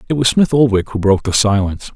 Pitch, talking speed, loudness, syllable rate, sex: 115 Hz, 245 wpm, -14 LUFS, 6.8 syllables/s, male